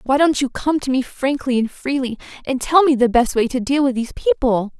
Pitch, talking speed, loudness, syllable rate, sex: 260 Hz, 250 wpm, -18 LUFS, 5.5 syllables/s, female